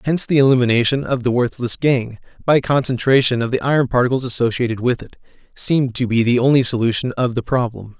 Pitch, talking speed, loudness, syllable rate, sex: 125 Hz, 190 wpm, -17 LUFS, 6.4 syllables/s, male